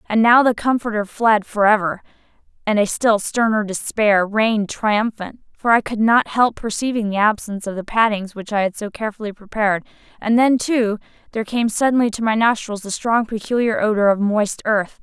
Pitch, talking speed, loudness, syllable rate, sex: 215 Hz, 185 wpm, -18 LUFS, 5.3 syllables/s, female